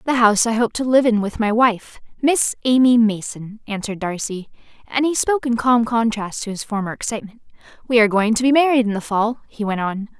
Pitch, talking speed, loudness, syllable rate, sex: 225 Hz, 210 wpm, -18 LUFS, 5.9 syllables/s, female